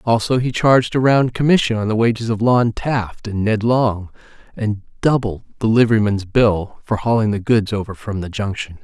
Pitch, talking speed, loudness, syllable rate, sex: 110 Hz, 190 wpm, -18 LUFS, 5.1 syllables/s, male